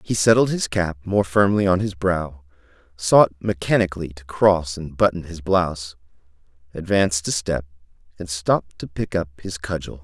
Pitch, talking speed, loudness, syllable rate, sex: 85 Hz, 160 wpm, -21 LUFS, 4.9 syllables/s, male